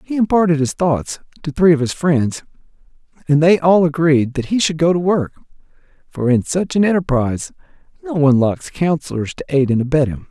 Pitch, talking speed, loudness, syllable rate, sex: 155 Hz, 190 wpm, -16 LUFS, 5.4 syllables/s, male